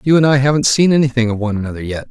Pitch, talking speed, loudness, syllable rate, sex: 125 Hz, 285 wpm, -14 LUFS, 8.0 syllables/s, male